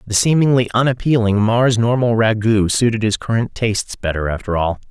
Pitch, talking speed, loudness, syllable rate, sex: 110 Hz, 160 wpm, -16 LUFS, 5.4 syllables/s, male